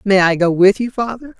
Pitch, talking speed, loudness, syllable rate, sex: 205 Hz, 260 wpm, -15 LUFS, 5.4 syllables/s, female